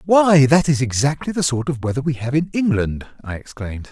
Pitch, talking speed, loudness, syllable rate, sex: 140 Hz, 215 wpm, -18 LUFS, 5.4 syllables/s, male